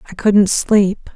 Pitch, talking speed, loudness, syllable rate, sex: 200 Hz, 155 wpm, -14 LUFS, 3.3 syllables/s, female